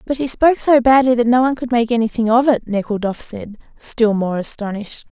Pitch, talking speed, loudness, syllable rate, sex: 235 Hz, 210 wpm, -16 LUFS, 5.9 syllables/s, female